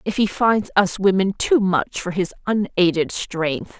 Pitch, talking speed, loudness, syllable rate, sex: 195 Hz, 175 wpm, -20 LUFS, 4.1 syllables/s, female